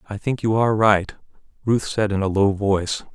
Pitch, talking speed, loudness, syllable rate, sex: 105 Hz, 210 wpm, -20 LUFS, 5.4 syllables/s, male